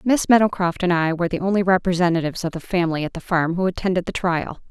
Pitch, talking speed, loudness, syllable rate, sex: 180 Hz, 230 wpm, -20 LUFS, 6.9 syllables/s, female